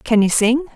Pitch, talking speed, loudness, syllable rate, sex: 245 Hz, 240 wpm, -16 LUFS, 4.9 syllables/s, female